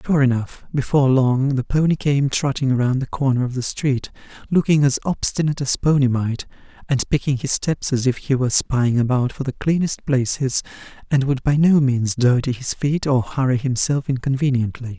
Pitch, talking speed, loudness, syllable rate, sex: 135 Hz, 185 wpm, -19 LUFS, 5.1 syllables/s, male